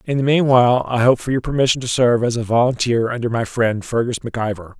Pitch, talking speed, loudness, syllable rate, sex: 120 Hz, 240 wpm, -18 LUFS, 6.3 syllables/s, male